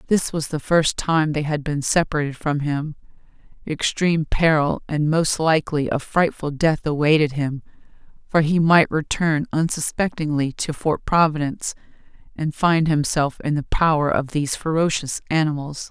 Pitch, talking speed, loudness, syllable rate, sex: 155 Hz, 145 wpm, -21 LUFS, 4.8 syllables/s, female